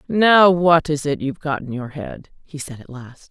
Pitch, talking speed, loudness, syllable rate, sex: 150 Hz, 235 wpm, -17 LUFS, 4.6 syllables/s, female